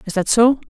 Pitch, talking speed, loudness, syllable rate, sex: 225 Hz, 250 wpm, -16 LUFS, 6.1 syllables/s, female